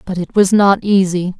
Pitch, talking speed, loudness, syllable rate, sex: 190 Hz, 215 wpm, -13 LUFS, 5.0 syllables/s, female